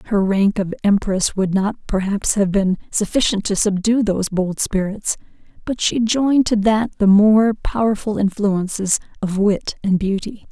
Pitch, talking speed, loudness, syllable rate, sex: 205 Hz, 160 wpm, -18 LUFS, 4.5 syllables/s, female